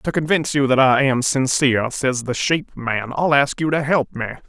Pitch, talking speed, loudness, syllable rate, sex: 135 Hz, 230 wpm, -18 LUFS, 5.0 syllables/s, male